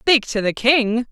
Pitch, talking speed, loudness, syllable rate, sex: 240 Hz, 215 wpm, -17 LUFS, 3.8 syllables/s, female